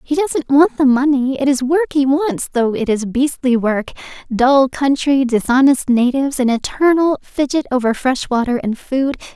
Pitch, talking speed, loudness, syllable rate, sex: 265 Hz, 165 wpm, -16 LUFS, 4.6 syllables/s, female